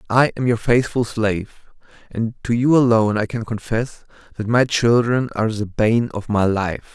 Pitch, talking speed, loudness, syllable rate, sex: 115 Hz, 180 wpm, -19 LUFS, 5.0 syllables/s, male